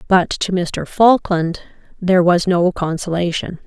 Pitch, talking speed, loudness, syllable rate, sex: 180 Hz, 130 wpm, -17 LUFS, 4.2 syllables/s, female